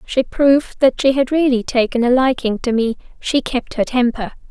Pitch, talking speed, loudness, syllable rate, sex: 250 Hz, 200 wpm, -17 LUFS, 5.0 syllables/s, female